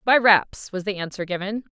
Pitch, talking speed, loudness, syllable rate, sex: 200 Hz, 205 wpm, -22 LUFS, 5.1 syllables/s, female